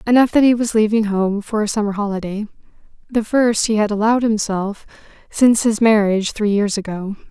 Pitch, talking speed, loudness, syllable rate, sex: 215 Hz, 170 wpm, -17 LUFS, 5.7 syllables/s, female